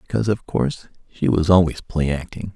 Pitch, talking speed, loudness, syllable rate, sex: 85 Hz, 190 wpm, -20 LUFS, 5.7 syllables/s, male